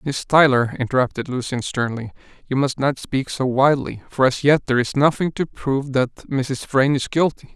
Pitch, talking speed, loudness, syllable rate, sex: 135 Hz, 190 wpm, -20 LUFS, 5.0 syllables/s, male